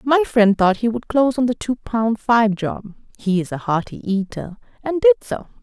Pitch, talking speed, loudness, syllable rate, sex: 230 Hz, 215 wpm, -19 LUFS, 3.9 syllables/s, female